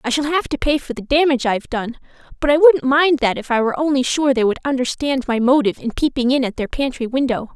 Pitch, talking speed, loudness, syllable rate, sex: 265 Hz, 255 wpm, -18 LUFS, 6.4 syllables/s, female